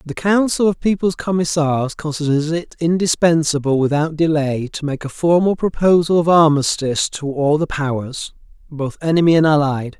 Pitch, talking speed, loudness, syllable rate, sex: 155 Hz, 150 wpm, -17 LUFS, 5.0 syllables/s, male